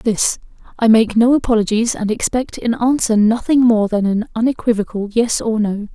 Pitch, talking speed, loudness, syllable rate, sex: 225 Hz, 170 wpm, -16 LUFS, 5.0 syllables/s, female